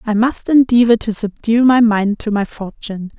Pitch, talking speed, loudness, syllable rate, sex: 225 Hz, 190 wpm, -14 LUFS, 5.0 syllables/s, female